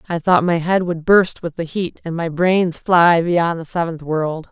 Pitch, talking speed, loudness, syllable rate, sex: 170 Hz, 225 wpm, -17 LUFS, 4.2 syllables/s, female